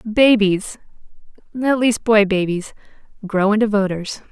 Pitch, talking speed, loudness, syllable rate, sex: 210 Hz, 85 wpm, -17 LUFS, 4.3 syllables/s, female